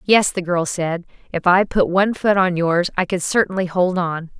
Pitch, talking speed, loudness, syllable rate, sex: 180 Hz, 220 wpm, -18 LUFS, 4.9 syllables/s, female